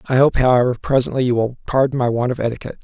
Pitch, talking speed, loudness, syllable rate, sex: 125 Hz, 235 wpm, -18 LUFS, 7.5 syllables/s, male